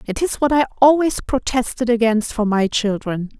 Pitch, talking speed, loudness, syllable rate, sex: 235 Hz, 175 wpm, -18 LUFS, 5.0 syllables/s, female